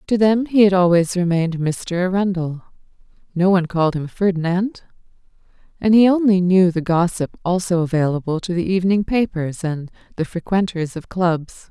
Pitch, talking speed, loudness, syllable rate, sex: 180 Hz, 155 wpm, -18 LUFS, 5.3 syllables/s, female